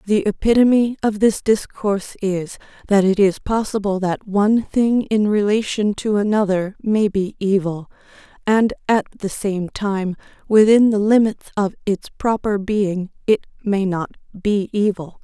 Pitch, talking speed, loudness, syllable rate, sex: 205 Hz, 145 wpm, -19 LUFS, 4.3 syllables/s, female